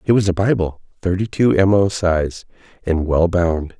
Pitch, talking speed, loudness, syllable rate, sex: 90 Hz, 175 wpm, -18 LUFS, 4.2 syllables/s, male